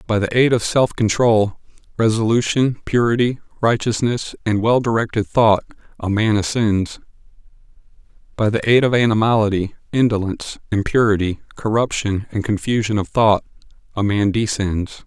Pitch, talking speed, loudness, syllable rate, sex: 110 Hz, 125 wpm, -18 LUFS, 5.0 syllables/s, male